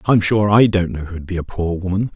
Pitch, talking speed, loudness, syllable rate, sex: 95 Hz, 280 wpm, -18 LUFS, 5.4 syllables/s, male